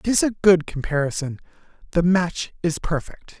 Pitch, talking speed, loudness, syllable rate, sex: 175 Hz, 160 wpm, -22 LUFS, 4.8 syllables/s, male